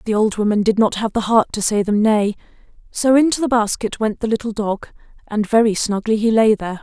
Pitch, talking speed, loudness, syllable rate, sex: 215 Hz, 230 wpm, -17 LUFS, 5.7 syllables/s, female